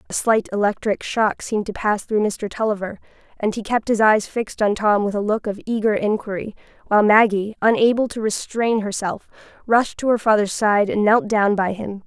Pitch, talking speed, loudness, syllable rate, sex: 210 Hz, 200 wpm, -20 LUFS, 5.3 syllables/s, female